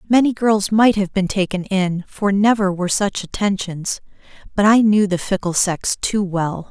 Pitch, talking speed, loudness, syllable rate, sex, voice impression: 195 Hz, 180 wpm, -18 LUFS, 4.6 syllables/s, female, feminine, adult-like, slightly bright, slightly soft, clear, slightly halting, friendly, slightly reassuring, slightly elegant, kind, slightly modest